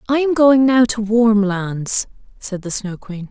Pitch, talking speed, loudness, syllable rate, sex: 220 Hz, 200 wpm, -16 LUFS, 3.9 syllables/s, female